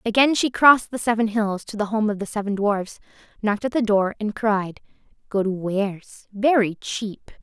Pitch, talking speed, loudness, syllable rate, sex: 215 Hz, 185 wpm, -22 LUFS, 4.9 syllables/s, female